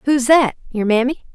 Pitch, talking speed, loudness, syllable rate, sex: 255 Hz, 135 wpm, -16 LUFS, 5.0 syllables/s, female